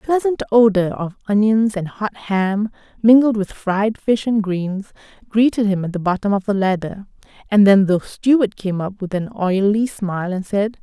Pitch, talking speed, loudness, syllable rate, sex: 205 Hz, 190 wpm, -18 LUFS, 4.6 syllables/s, female